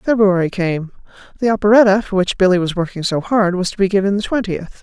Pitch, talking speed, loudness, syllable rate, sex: 195 Hz, 210 wpm, -16 LUFS, 6.1 syllables/s, female